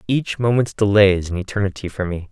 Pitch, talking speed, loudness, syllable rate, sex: 100 Hz, 210 wpm, -19 LUFS, 6.1 syllables/s, male